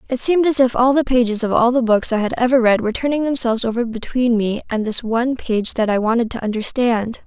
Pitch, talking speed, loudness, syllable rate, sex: 240 Hz, 250 wpm, -17 LUFS, 6.1 syllables/s, female